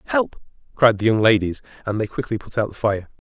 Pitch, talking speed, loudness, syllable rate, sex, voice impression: 115 Hz, 220 wpm, -21 LUFS, 6.1 syllables/s, male, very masculine, slightly adult-like, slightly thick, tensed, slightly powerful, dark, hard, muffled, fluent, raspy, cool, intellectual, slightly refreshing, sincere, calm, slightly mature, friendly, reassuring, slightly unique, elegant, slightly wild, slightly sweet, slightly lively, kind, modest